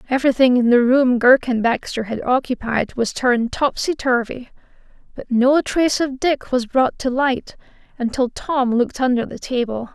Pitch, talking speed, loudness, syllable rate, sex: 255 Hz, 170 wpm, -18 LUFS, 4.8 syllables/s, female